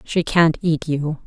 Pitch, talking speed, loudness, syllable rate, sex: 160 Hz, 190 wpm, -19 LUFS, 3.7 syllables/s, female